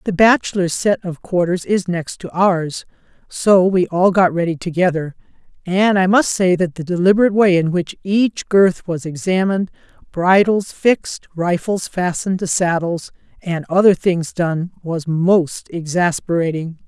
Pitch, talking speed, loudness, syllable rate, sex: 180 Hz, 150 wpm, -17 LUFS, 4.4 syllables/s, female